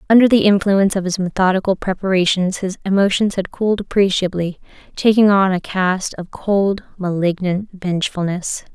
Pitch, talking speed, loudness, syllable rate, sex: 190 Hz, 135 wpm, -17 LUFS, 5.2 syllables/s, female